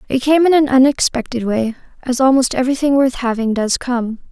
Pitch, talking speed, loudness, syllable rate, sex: 255 Hz, 180 wpm, -15 LUFS, 5.6 syllables/s, female